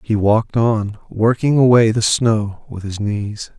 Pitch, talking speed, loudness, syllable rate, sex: 110 Hz, 165 wpm, -16 LUFS, 3.9 syllables/s, male